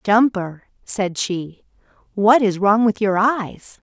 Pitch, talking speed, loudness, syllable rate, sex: 205 Hz, 140 wpm, -18 LUFS, 3.3 syllables/s, female